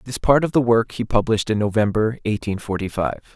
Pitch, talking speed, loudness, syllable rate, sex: 110 Hz, 215 wpm, -20 LUFS, 5.9 syllables/s, male